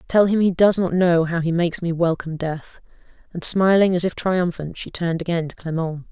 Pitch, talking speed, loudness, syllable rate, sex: 170 Hz, 215 wpm, -20 LUFS, 5.6 syllables/s, female